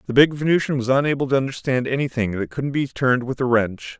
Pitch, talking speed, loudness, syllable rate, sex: 130 Hz, 225 wpm, -21 LUFS, 6.3 syllables/s, male